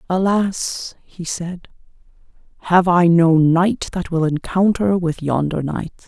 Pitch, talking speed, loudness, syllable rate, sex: 175 Hz, 130 wpm, -18 LUFS, 3.5 syllables/s, female